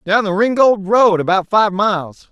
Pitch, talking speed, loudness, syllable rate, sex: 200 Hz, 180 wpm, -14 LUFS, 4.5 syllables/s, male